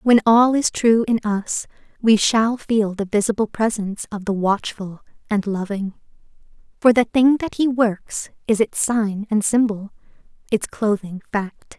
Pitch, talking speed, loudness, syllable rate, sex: 215 Hz, 160 wpm, -20 LUFS, 4.2 syllables/s, female